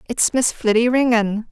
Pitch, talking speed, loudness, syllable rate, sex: 230 Hz, 160 wpm, -17 LUFS, 4.5 syllables/s, female